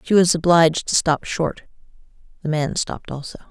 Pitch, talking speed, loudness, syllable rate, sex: 165 Hz, 170 wpm, -19 LUFS, 5.5 syllables/s, female